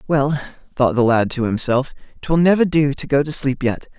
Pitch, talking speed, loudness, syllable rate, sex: 140 Hz, 210 wpm, -18 LUFS, 4.8 syllables/s, male